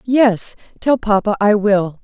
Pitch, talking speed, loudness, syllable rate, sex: 215 Hz, 150 wpm, -16 LUFS, 3.6 syllables/s, female